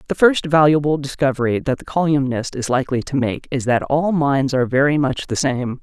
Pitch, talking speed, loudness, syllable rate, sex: 140 Hz, 205 wpm, -18 LUFS, 5.5 syllables/s, female